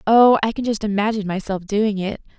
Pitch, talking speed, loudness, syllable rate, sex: 210 Hz, 200 wpm, -19 LUFS, 5.8 syllables/s, female